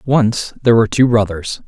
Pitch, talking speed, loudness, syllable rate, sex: 115 Hz, 180 wpm, -15 LUFS, 5.4 syllables/s, male